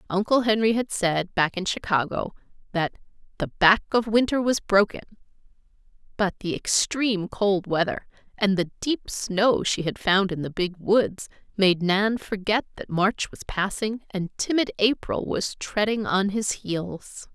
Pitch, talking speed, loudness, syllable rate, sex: 200 Hz, 155 wpm, -24 LUFS, 4.2 syllables/s, female